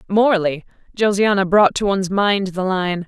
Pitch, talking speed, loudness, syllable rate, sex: 190 Hz, 155 wpm, -17 LUFS, 5.5 syllables/s, female